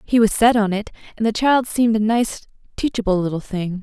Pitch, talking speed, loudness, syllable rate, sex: 215 Hz, 220 wpm, -19 LUFS, 5.7 syllables/s, female